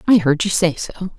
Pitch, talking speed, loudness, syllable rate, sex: 175 Hz, 255 wpm, -18 LUFS, 5.0 syllables/s, female